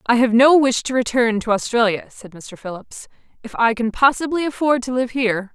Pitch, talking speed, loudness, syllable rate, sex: 240 Hz, 205 wpm, -18 LUFS, 5.4 syllables/s, female